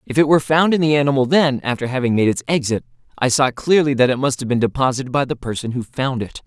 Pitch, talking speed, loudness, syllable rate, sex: 135 Hz, 260 wpm, -18 LUFS, 6.6 syllables/s, male